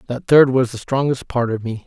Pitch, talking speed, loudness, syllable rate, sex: 125 Hz, 255 wpm, -17 LUFS, 5.3 syllables/s, male